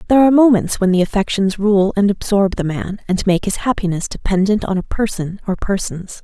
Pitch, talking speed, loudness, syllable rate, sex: 195 Hz, 200 wpm, -17 LUFS, 5.7 syllables/s, female